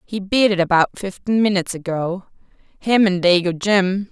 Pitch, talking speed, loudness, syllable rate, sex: 190 Hz, 160 wpm, -18 LUFS, 4.7 syllables/s, female